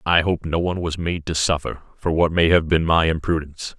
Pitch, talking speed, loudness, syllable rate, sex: 80 Hz, 240 wpm, -20 LUFS, 5.7 syllables/s, male